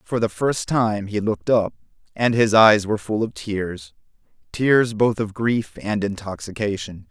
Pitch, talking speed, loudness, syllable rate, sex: 105 Hz, 160 wpm, -21 LUFS, 4.3 syllables/s, male